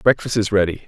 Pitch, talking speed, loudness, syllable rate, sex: 105 Hz, 205 wpm, -19 LUFS, 6.3 syllables/s, male